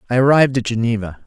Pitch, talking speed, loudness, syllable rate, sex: 120 Hz, 190 wpm, -16 LUFS, 7.6 syllables/s, male